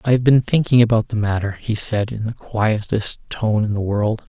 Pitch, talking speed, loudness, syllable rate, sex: 110 Hz, 220 wpm, -19 LUFS, 4.9 syllables/s, male